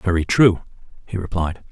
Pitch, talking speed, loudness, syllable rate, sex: 90 Hz, 140 wpm, -19 LUFS, 5.1 syllables/s, male